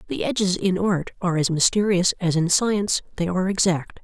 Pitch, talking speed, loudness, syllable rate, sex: 185 Hz, 195 wpm, -21 LUFS, 5.6 syllables/s, female